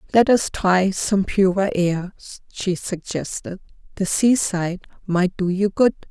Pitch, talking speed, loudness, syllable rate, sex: 190 Hz, 140 wpm, -20 LUFS, 4.1 syllables/s, female